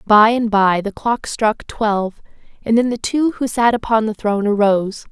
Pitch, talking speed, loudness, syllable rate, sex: 220 Hz, 200 wpm, -17 LUFS, 4.9 syllables/s, female